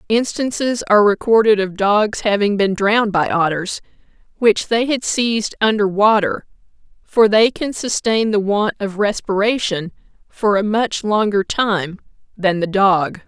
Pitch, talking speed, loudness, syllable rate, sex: 210 Hz, 145 wpm, -17 LUFS, 4.3 syllables/s, female